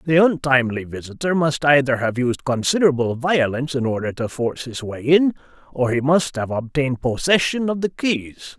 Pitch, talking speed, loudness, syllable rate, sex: 140 Hz, 175 wpm, -20 LUFS, 5.3 syllables/s, male